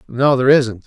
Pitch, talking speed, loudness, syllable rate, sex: 125 Hz, 210 wpm, -14 LUFS, 5.7 syllables/s, male